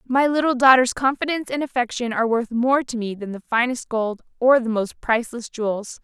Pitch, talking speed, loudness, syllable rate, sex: 245 Hz, 200 wpm, -21 LUFS, 5.5 syllables/s, female